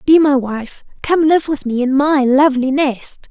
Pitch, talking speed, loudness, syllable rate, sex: 275 Hz, 200 wpm, -14 LUFS, 4.4 syllables/s, female